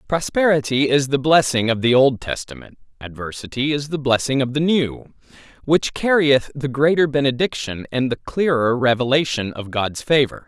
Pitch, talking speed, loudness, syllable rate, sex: 135 Hz, 155 wpm, -19 LUFS, 4.9 syllables/s, male